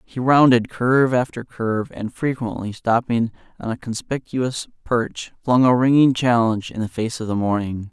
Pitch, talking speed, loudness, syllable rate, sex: 120 Hz, 165 wpm, -20 LUFS, 4.8 syllables/s, male